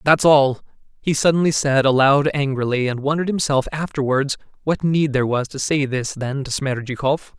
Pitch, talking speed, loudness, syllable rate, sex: 140 Hz, 170 wpm, -19 LUFS, 5.2 syllables/s, male